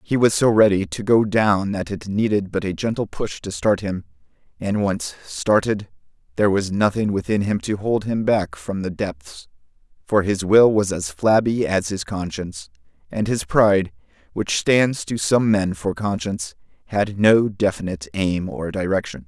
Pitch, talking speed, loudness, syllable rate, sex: 100 Hz, 175 wpm, -20 LUFS, 4.6 syllables/s, male